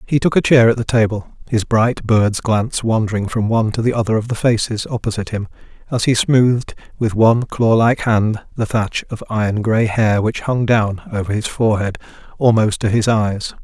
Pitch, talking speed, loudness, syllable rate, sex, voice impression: 110 Hz, 200 wpm, -17 LUFS, 5.3 syllables/s, male, masculine, adult-like, slightly tensed, powerful, clear, fluent, cool, calm, friendly, wild, kind, slightly modest